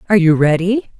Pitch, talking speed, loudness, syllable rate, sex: 185 Hz, 180 wpm, -14 LUFS, 6.6 syllables/s, female